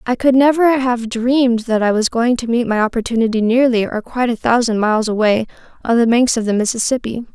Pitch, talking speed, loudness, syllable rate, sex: 235 Hz, 210 wpm, -16 LUFS, 5.9 syllables/s, female